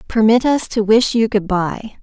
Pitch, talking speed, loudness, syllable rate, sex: 220 Hz, 210 wpm, -16 LUFS, 4.4 syllables/s, female